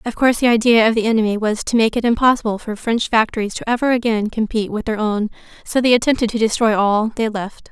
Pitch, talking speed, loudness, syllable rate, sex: 225 Hz, 235 wpm, -17 LUFS, 6.4 syllables/s, female